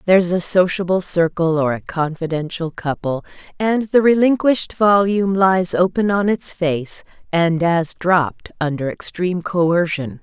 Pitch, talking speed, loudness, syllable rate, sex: 175 Hz, 135 wpm, -18 LUFS, 4.5 syllables/s, female